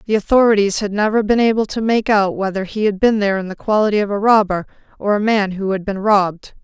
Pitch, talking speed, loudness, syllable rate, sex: 205 Hz, 245 wpm, -16 LUFS, 6.2 syllables/s, female